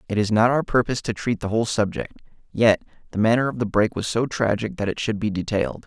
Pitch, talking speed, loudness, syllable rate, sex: 110 Hz, 245 wpm, -22 LUFS, 6.4 syllables/s, male